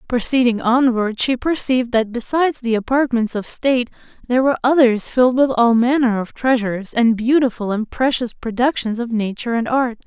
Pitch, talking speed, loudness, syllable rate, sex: 240 Hz, 165 wpm, -18 LUFS, 5.5 syllables/s, female